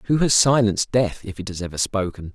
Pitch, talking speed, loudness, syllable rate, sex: 105 Hz, 230 wpm, -20 LUFS, 6.1 syllables/s, male